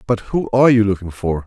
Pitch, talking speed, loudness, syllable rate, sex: 105 Hz, 245 wpm, -16 LUFS, 6.0 syllables/s, male